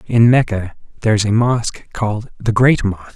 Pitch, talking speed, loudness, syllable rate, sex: 110 Hz, 190 wpm, -16 LUFS, 4.8 syllables/s, male